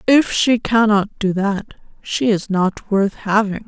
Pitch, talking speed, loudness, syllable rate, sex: 210 Hz, 165 wpm, -17 LUFS, 3.7 syllables/s, female